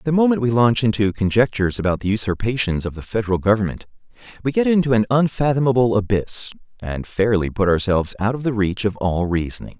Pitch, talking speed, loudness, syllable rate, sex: 110 Hz, 185 wpm, -19 LUFS, 6.2 syllables/s, male